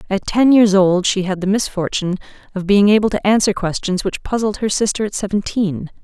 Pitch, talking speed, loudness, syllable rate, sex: 200 Hz, 200 wpm, -16 LUFS, 5.6 syllables/s, female